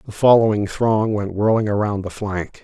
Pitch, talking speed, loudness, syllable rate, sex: 105 Hz, 180 wpm, -18 LUFS, 4.8 syllables/s, male